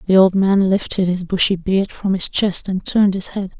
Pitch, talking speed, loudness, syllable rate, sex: 190 Hz, 235 wpm, -17 LUFS, 5.0 syllables/s, female